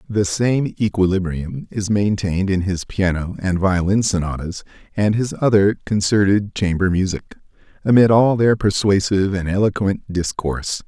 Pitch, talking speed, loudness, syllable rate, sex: 100 Hz, 130 wpm, -18 LUFS, 4.8 syllables/s, male